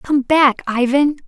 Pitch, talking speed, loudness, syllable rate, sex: 270 Hz, 140 wpm, -15 LUFS, 3.5 syllables/s, female